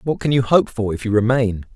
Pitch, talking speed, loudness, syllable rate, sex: 115 Hz, 275 wpm, -18 LUFS, 5.5 syllables/s, male